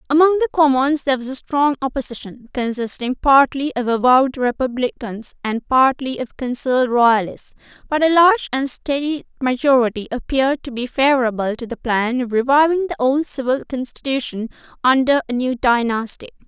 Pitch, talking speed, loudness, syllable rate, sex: 260 Hz, 150 wpm, -18 LUFS, 5.4 syllables/s, female